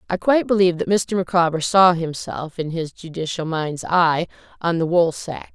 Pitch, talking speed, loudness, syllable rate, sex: 170 Hz, 175 wpm, -20 LUFS, 5.0 syllables/s, female